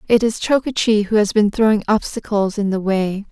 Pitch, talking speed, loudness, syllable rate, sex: 210 Hz, 200 wpm, -17 LUFS, 5.2 syllables/s, female